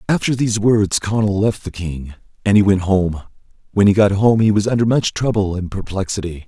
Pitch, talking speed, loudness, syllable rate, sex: 100 Hz, 205 wpm, -17 LUFS, 5.5 syllables/s, male